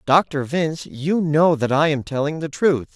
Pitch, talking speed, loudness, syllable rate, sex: 150 Hz, 205 wpm, -20 LUFS, 4.2 syllables/s, male